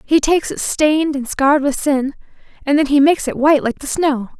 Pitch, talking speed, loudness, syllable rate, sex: 290 Hz, 230 wpm, -16 LUFS, 5.9 syllables/s, female